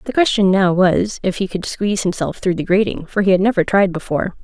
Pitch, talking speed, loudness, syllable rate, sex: 195 Hz, 245 wpm, -17 LUFS, 6.0 syllables/s, female